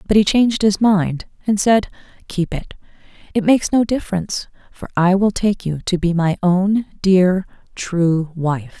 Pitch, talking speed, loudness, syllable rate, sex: 190 Hz, 170 wpm, -17 LUFS, 4.5 syllables/s, female